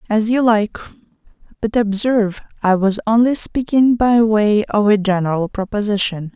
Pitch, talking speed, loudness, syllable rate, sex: 215 Hz, 140 wpm, -16 LUFS, 4.8 syllables/s, female